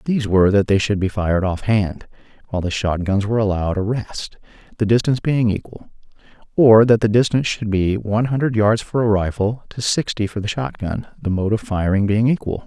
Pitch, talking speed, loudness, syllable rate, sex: 105 Hz, 215 wpm, -19 LUFS, 5.8 syllables/s, male